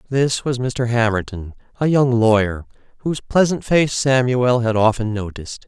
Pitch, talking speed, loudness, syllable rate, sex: 120 Hz, 150 wpm, -18 LUFS, 4.7 syllables/s, male